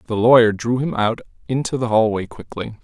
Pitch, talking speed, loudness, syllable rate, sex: 115 Hz, 190 wpm, -18 LUFS, 5.5 syllables/s, male